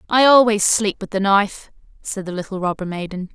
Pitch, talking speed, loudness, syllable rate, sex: 200 Hz, 195 wpm, -18 LUFS, 5.7 syllables/s, female